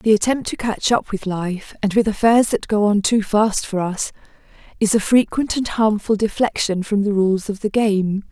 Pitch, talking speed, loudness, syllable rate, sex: 210 Hz, 210 wpm, -19 LUFS, 4.7 syllables/s, female